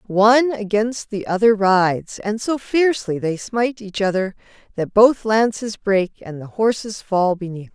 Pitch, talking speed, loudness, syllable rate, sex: 210 Hz, 170 wpm, -19 LUFS, 4.6 syllables/s, female